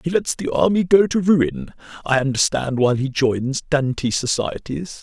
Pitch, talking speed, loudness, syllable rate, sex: 145 Hz, 165 wpm, -19 LUFS, 4.6 syllables/s, male